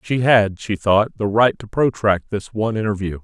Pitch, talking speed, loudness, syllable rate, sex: 105 Hz, 205 wpm, -18 LUFS, 5.0 syllables/s, male